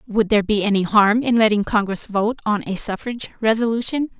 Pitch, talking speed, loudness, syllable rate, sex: 215 Hz, 185 wpm, -19 LUFS, 5.8 syllables/s, female